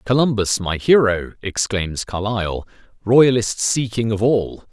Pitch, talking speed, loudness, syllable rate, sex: 110 Hz, 125 wpm, -18 LUFS, 4.1 syllables/s, male